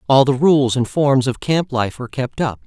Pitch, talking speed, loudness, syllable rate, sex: 135 Hz, 250 wpm, -17 LUFS, 4.9 syllables/s, male